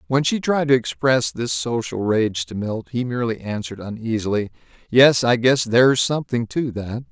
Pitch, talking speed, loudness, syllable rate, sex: 120 Hz, 175 wpm, -20 LUFS, 5.1 syllables/s, male